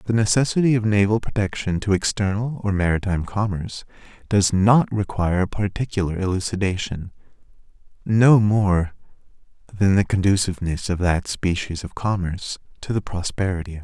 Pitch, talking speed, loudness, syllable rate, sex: 100 Hz, 140 wpm, -21 LUFS, 5.7 syllables/s, male